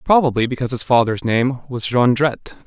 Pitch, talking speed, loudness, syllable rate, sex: 125 Hz, 155 wpm, -18 LUFS, 5.5 syllables/s, male